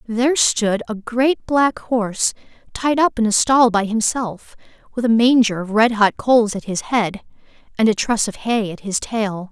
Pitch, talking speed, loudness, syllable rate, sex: 225 Hz, 195 wpm, -18 LUFS, 4.5 syllables/s, female